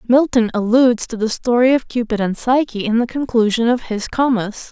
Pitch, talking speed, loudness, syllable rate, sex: 235 Hz, 190 wpm, -17 LUFS, 5.3 syllables/s, female